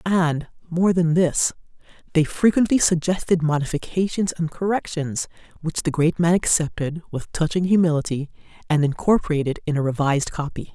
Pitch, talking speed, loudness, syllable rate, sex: 165 Hz, 135 wpm, -21 LUFS, 5.3 syllables/s, female